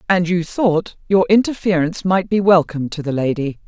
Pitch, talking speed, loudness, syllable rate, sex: 175 Hz, 180 wpm, -17 LUFS, 5.5 syllables/s, female